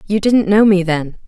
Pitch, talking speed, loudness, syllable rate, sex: 195 Hz, 235 wpm, -14 LUFS, 4.9 syllables/s, female